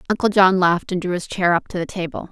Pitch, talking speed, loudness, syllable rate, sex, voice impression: 185 Hz, 285 wpm, -19 LUFS, 6.6 syllables/s, female, feminine, gender-neutral, slightly young, slightly adult-like, thin, slightly tensed, slightly weak, slightly bright, slightly hard, clear, fluent, slightly cute, cool, intellectual, refreshing, slightly sincere, friendly, slightly reassuring, very unique, slightly wild, slightly lively, slightly strict, slightly intense